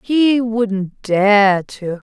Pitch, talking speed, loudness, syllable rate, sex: 215 Hz, 115 wpm, -15 LUFS, 2.1 syllables/s, female